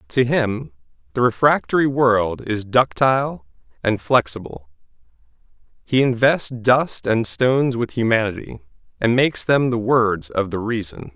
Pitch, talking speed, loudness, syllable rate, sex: 115 Hz, 130 wpm, -19 LUFS, 4.4 syllables/s, male